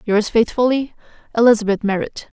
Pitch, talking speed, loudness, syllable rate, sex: 220 Hz, 100 wpm, -17 LUFS, 5.6 syllables/s, female